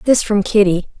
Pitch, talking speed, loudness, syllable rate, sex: 205 Hz, 180 wpm, -15 LUFS, 5.3 syllables/s, female